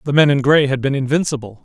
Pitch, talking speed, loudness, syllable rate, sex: 140 Hz, 255 wpm, -16 LUFS, 6.6 syllables/s, male